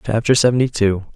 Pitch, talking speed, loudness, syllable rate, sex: 115 Hz, 155 wpm, -16 LUFS, 6.1 syllables/s, male